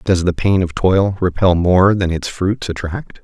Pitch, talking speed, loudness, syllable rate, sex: 90 Hz, 205 wpm, -16 LUFS, 4.2 syllables/s, male